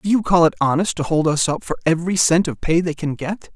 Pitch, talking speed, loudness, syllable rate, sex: 165 Hz, 285 wpm, -19 LUFS, 6.0 syllables/s, male